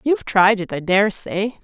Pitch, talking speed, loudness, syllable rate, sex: 200 Hz, 220 wpm, -18 LUFS, 4.6 syllables/s, female